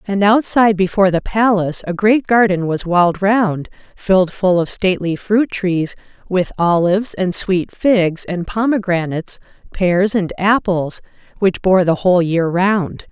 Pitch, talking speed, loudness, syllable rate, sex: 190 Hz, 150 wpm, -16 LUFS, 4.5 syllables/s, female